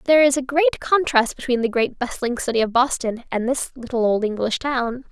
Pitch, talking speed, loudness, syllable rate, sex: 255 Hz, 210 wpm, -20 LUFS, 5.3 syllables/s, female